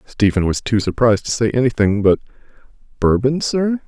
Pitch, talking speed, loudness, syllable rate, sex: 120 Hz, 155 wpm, -17 LUFS, 5.5 syllables/s, male